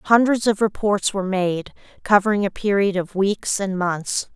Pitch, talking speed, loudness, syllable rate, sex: 200 Hz, 165 wpm, -20 LUFS, 4.5 syllables/s, female